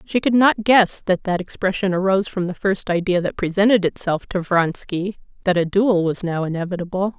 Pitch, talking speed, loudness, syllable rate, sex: 190 Hz, 185 wpm, -19 LUFS, 5.3 syllables/s, female